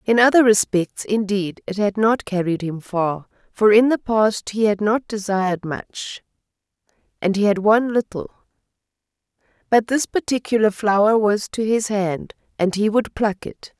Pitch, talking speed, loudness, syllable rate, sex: 210 Hz, 160 wpm, -19 LUFS, 4.5 syllables/s, female